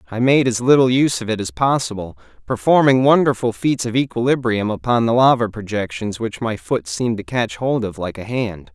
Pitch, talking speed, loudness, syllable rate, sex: 115 Hz, 200 wpm, -18 LUFS, 5.5 syllables/s, male